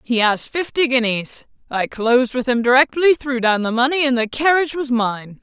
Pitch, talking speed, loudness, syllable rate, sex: 255 Hz, 200 wpm, -17 LUFS, 5.3 syllables/s, female